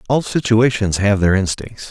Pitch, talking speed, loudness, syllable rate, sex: 105 Hz, 155 wpm, -16 LUFS, 4.7 syllables/s, male